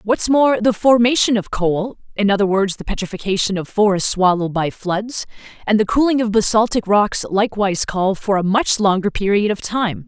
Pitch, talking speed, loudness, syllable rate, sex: 205 Hz, 185 wpm, -17 LUFS, 5.4 syllables/s, female